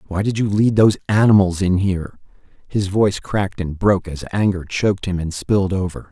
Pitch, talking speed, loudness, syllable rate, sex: 95 Hz, 195 wpm, -18 LUFS, 5.8 syllables/s, male